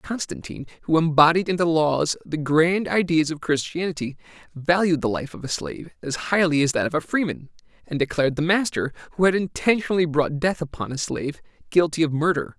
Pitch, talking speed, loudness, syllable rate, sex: 160 Hz, 185 wpm, -22 LUFS, 5.8 syllables/s, male